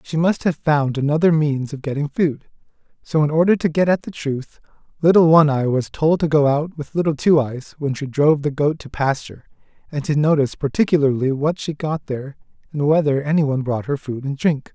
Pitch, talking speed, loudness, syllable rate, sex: 150 Hz, 210 wpm, -19 LUFS, 5.5 syllables/s, male